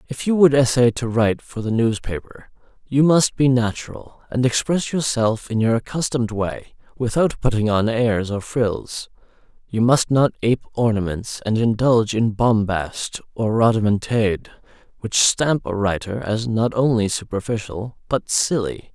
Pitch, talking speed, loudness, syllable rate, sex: 115 Hz, 150 wpm, -20 LUFS, 4.6 syllables/s, male